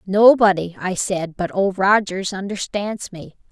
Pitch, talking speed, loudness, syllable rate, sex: 190 Hz, 135 wpm, -19 LUFS, 4.1 syllables/s, female